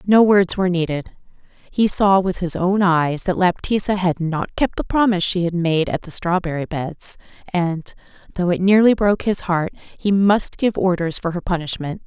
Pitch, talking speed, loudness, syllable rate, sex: 180 Hz, 190 wpm, -19 LUFS, 4.8 syllables/s, female